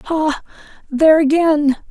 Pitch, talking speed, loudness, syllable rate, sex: 305 Hz, 95 wpm, -14 LUFS, 3.9 syllables/s, female